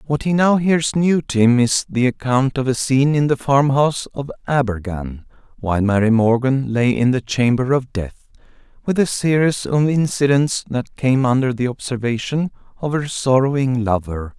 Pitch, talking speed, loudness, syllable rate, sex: 130 Hz, 175 wpm, -18 LUFS, 4.8 syllables/s, male